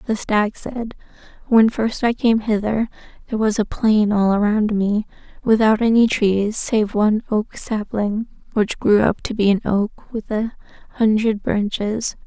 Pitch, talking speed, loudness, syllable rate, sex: 215 Hz, 160 wpm, -19 LUFS, 4.2 syllables/s, female